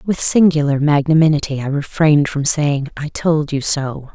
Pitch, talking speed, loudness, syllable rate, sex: 150 Hz, 160 wpm, -16 LUFS, 4.7 syllables/s, female